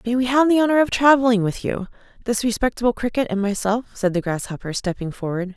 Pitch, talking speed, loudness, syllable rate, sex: 225 Hz, 195 wpm, -20 LUFS, 6.3 syllables/s, female